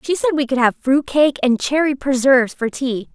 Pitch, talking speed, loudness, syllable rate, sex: 270 Hz, 230 wpm, -17 LUFS, 5.1 syllables/s, female